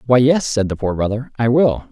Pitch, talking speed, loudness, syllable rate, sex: 120 Hz, 250 wpm, -17 LUFS, 5.4 syllables/s, male